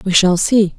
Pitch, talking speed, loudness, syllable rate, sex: 190 Hz, 230 wpm, -14 LUFS, 4.4 syllables/s, female